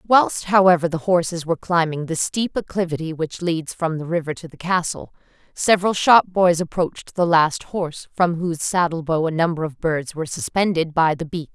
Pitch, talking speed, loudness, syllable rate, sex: 170 Hz, 190 wpm, -20 LUFS, 5.3 syllables/s, female